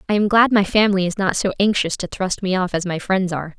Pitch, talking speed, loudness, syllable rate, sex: 190 Hz, 285 wpm, -19 LUFS, 6.3 syllables/s, female